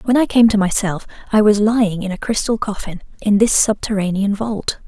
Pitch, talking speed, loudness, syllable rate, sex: 210 Hz, 195 wpm, -17 LUFS, 5.4 syllables/s, female